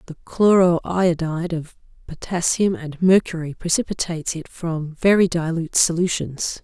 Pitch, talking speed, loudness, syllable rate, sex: 170 Hz, 120 wpm, -20 LUFS, 5.0 syllables/s, female